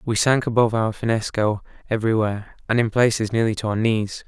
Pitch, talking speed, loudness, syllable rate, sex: 110 Hz, 185 wpm, -21 LUFS, 6.1 syllables/s, male